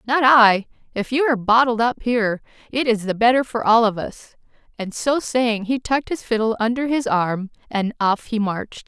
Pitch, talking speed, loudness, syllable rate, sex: 230 Hz, 205 wpm, -19 LUFS, 5.1 syllables/s, female